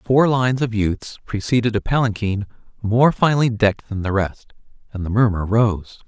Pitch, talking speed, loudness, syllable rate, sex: 110 Hz, 170 wpm, -19 LUFS, 5.1 syllables/s, male